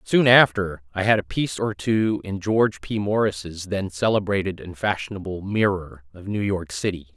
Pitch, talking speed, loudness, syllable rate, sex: 95 Hz, 175 wpm, -22 LUFS, 4.9 syllables/s, male